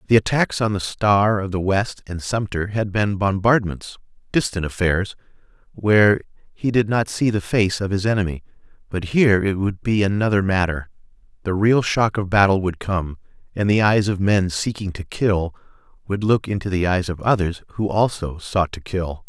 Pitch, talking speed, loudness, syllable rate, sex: 100 Hz, 185 wpm, -20 LUFS, 4.9 syllables/s, male